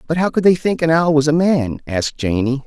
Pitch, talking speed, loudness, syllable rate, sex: 150 Hz, 270 wpm, -16 LUFS, 5.7 syllables/s, male